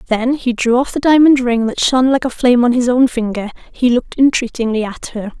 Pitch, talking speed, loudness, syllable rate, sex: 245 Hz, 220 wpm, -14 LUFS, 5.7 syllables/s, female